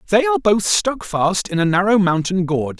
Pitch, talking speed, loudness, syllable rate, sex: 175 Hz, 215 wpm, -17 LUFS, 5.9 syllables/s, male